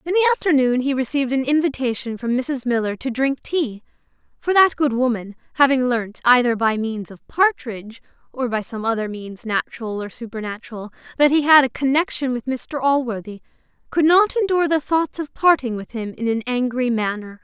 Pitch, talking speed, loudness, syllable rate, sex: 255 Hz, 180 wpm, -20 LUFS, 5.4 syllables/s, female